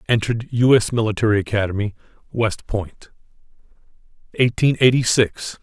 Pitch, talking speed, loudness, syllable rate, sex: 110 Hz, 105 wpm, -19 LUFS, 5.3 syllables/s, male